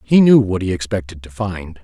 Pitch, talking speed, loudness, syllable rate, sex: 100 Hz, 230 wpm, -17 LUFS, 5.2 syllables/s, male